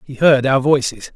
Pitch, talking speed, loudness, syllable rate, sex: 135 Hz, 205 wpm, -15 LUFS, 4.8 syllables/s, male